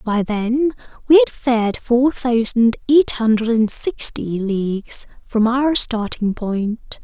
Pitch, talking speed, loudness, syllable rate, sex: 235 Hz, 130 wpm, -18 LUFS, 3.3 syllables/s, female